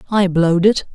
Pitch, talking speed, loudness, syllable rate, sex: 185 Hz, 190 wpm, -15 LUFS, 5.8 syllables/s, female